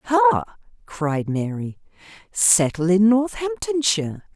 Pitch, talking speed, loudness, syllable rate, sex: 200 Hz, 85 wpm, -20 LUFS, 3.5 syllables/s, female